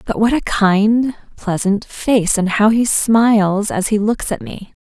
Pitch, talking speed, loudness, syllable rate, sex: 215 Hz, 185 wpm, -15 LUFS, 3.9 syllables/s, female